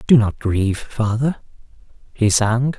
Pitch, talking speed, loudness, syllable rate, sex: 115 Hz, 130 wpm, -19 LUFS, 4.2 syllables/s, male